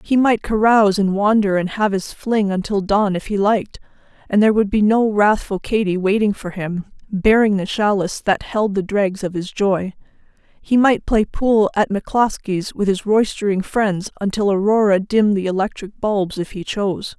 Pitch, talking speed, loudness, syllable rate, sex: 205 Hz, 185 wpm, -18 LUFS, 4.9 syllables/s, female